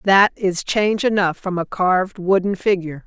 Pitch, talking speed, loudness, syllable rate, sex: 190 Hz, 175 wpm, -19 LUFS, 5.1 syllables/s, female